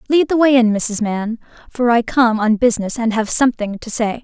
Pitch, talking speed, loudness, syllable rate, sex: 230 Hz, 225 wpm, -16 LUFS, 5.4 syllables/s, female